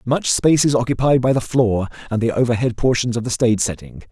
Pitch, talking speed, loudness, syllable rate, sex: 120 Hz, 220 wpm, -18 LUFS, 6.2 syllables/s, male